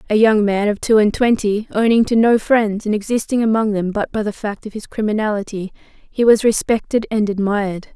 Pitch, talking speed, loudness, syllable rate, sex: 215 Hz, 205 wpm, -17 LUFS, 5.5 syllables/s, female